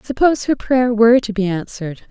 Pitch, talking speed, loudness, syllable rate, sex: 230 Hz, 200 wpm, -16 LUFS, 6.0 syllables/s, female